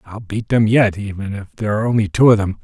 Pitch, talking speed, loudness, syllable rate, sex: 105 Hz, 275 wpm, -17 LUFS, 6.4 syllables/s, male